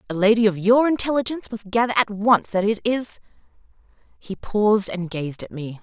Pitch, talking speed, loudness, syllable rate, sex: 215 Hz, 185 wpm, -21 LUFS, 5.5 syllables/s, female